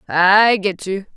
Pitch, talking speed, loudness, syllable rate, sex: 195 Hz, 155 wpm, -15 LUFS, 3.2 syllables/s, female